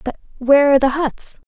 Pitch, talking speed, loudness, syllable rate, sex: 275 Hz, 205 wpm, -15 LUFS, 6.4 syllables/s, female